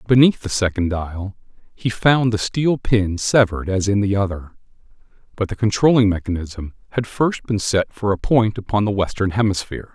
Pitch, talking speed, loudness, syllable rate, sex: 105 Hz, 175 wpm, -19 LUFS, 5.1 syllables/s, male